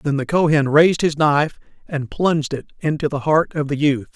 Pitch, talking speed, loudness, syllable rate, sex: 150 Hz, 215 wpm, -18 LUFS, 5.5 syllables/s, male